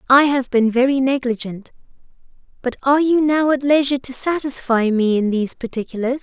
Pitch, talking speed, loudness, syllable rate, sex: 260 Hz, 155 wpm, -18 LUFS, 5.7 syllables/s, female